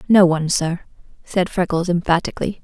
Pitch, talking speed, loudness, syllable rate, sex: 175 Hz, 135 wpm, -19 LUFS, 5.7 syllables/s, female